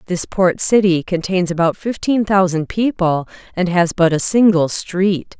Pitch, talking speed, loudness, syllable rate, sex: 180 Hz, 155 wpm, -16 LUFS, 4.3 syllables/s, female